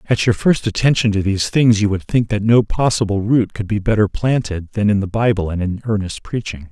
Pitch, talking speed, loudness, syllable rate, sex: 105 Hz, 230 wpm, -17 LUFS, 5.5 syllables/s, male